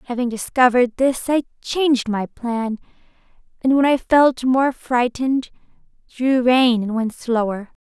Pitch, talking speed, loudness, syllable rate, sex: 250 Hz, 140 wpm, -19 LUFS, 4.4 syllables/s, female